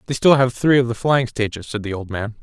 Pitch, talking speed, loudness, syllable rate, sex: 120 Hz, 295 wpm, -19 LUFS, 5.9 syllables/s, male